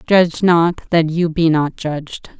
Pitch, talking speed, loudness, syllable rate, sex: 165 Hz, 175 wpm, -16 LUFS, 4.0 syllables/s, female